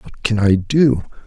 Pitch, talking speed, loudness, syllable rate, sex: 110 Hz, 190 wpm, -16 LUFS, 3.9 syllables/s, male